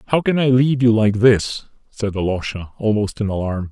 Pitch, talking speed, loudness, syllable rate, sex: 115 Hz, 195 wpm, -18 LUFS, 5.3 syllables/s, male